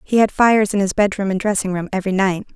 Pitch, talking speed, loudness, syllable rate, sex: 200 Hz, 260 wpm, -18 LUFS, 6.8 syllables/s, female